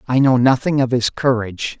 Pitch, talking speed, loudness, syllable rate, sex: 125 Hz, 200 wpm, -17 LUFS, 5.5 syllables/s, male